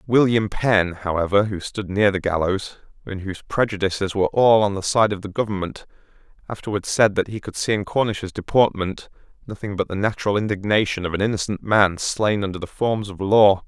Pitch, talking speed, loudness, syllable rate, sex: 100 Hz, 190 wpm, -21 LUFS, 5.6 syllables/s, male